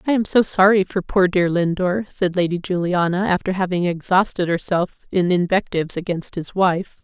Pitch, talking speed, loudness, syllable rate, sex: 180 Hz, 170 wpm, -19 LUFS, 5.3 syllables/s, female